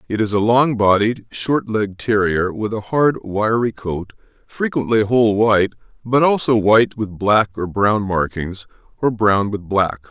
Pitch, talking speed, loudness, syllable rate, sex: 110 Hz, 165 wpm, -17 LUFS, 4.4 syllables/s, male